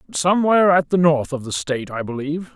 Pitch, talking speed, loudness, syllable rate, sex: 155 Hz, 210 wpm, -19 LUFS, 6.6 syllables/s, male